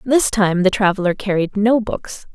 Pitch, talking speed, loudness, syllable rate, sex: 205 Hz, 180 wpm, -17 LUFS, 4.5 syllables/s, female